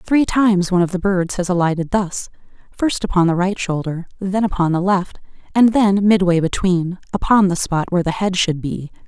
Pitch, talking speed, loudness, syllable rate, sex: 185 Hz, 185 wpm, -18 LUFS, 5.2 syllables/s, female